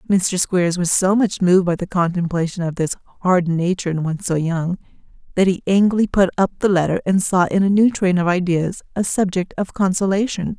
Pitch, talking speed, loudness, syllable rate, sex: 185 Hz, 205 wpm, -18 LUFS, 5.8 syllables/s, female